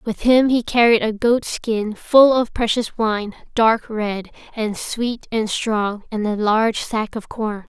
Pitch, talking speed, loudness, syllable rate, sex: 220 Hz, 180 wpm, -19 LUFS, 3.7 syllables/s, female